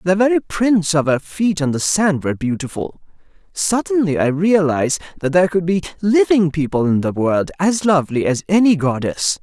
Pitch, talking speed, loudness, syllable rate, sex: 170 Hz, 180 wpm, -17 LUFS, 5.2 syllables/s, male